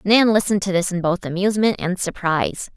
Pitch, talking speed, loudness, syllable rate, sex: 190 Hz, 195 wpm, -20 LUFS, 6.1 syllables/s, female